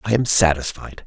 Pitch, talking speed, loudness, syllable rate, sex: 100 Hz, 170 wpm, -18 LUFS, 5.2 syllables/s, male